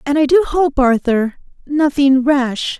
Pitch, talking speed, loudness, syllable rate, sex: 275 Hz, 130 wpm, -15 LUFS, 3.9 syllables/s, female